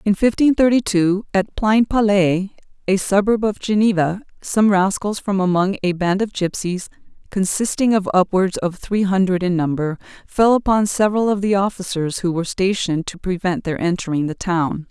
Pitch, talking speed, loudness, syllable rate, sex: 195 Hz, 165 wpm, -18 LUFS, 5.0 syllables/s, female